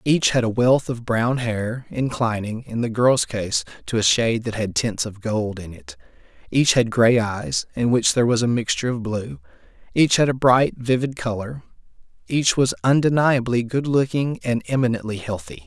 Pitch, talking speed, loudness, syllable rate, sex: 115 Hz, 185 wpm, -21 LUFS, 4.8 syllables/s, male